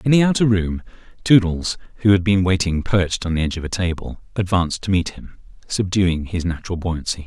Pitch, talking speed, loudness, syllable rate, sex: 95 Hz, 200 wpm, -20 LUFS, 5.8 syllables/s, male